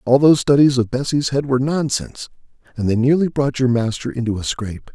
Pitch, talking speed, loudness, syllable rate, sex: 130 Hz, 205 wpm, -18 LUFS, 6.2 syllables/s, male